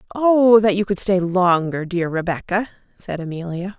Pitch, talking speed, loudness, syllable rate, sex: 190 Hz, 160 wpm, -19 LUFS, 4.7 syllables/s, female